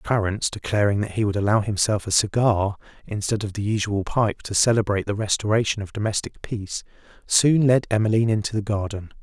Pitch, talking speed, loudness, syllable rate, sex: 105 Hz, 175 wpm, -22 LUFS, 5.9 syllables/s, male